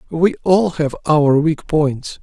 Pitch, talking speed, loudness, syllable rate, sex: 155 Hz, 160 wpm, -16 LUFS, 3.2 syllables/s, male